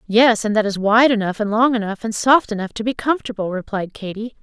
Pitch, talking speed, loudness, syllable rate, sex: 220 Hz, 230 wpm, -18 LUFS, 5.9 syllables/s, female